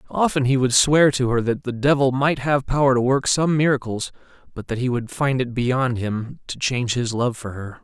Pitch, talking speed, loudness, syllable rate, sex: 130 Hz, 230 wpm, -20 LUFS, 5.1 syllables/s, male